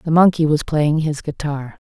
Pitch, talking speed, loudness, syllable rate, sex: 155 Hz, 190 wpm, -18 LUFS, 4.6 syllables/s, female